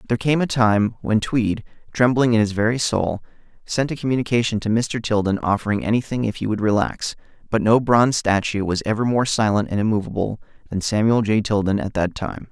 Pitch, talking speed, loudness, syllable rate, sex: 110 Hz, 190 wpm, -20 LUFS, 5.7 syllables/s, male